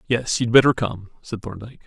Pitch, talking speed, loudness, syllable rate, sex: 115 Hz, 195 wpm, -19 LUFS, 5.8 syllables/s, male